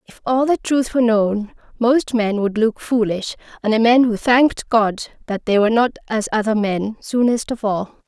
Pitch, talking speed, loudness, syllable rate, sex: 225 Hz, 200 wpm, -18 LUFS, 5.0 syllables/s, female